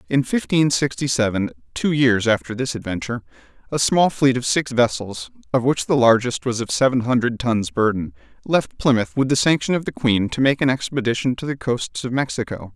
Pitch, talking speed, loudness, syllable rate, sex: 125 Hz, 200 wpm, -20 LUFS, 5.4 syllables/s, male